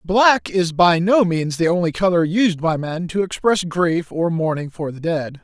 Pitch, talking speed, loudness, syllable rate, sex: 175 Hz, 210 wpm, -18 LUFS, 4.3 syllables/s, male